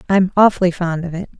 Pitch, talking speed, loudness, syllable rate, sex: 180 Hz, 215 wpm, -16 LUFS, 6.3 syllables/s, female